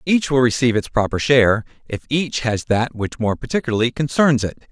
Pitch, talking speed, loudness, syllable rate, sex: 125 Hz, 190 wpm, -18 LUFS, 5.7 syllables/s, male